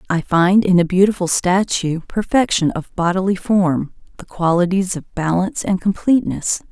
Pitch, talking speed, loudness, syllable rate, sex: 185 Hz, 145 wpm, -17 LUFS, 4.9 syllables/s, female